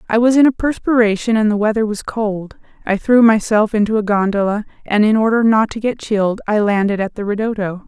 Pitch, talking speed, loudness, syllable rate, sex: 215 Hz, 215 wpm, -16 LUFS, 5.7 syllables/s, female